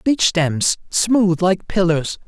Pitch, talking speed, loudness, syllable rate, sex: 185 Hz, 130 wpm, -17 LUFS, 3.0 syllables/s, male